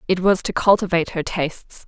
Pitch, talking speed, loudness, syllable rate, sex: 180 Hz, 195 wpm, -19 LUFS, 5.9 syllables/s, female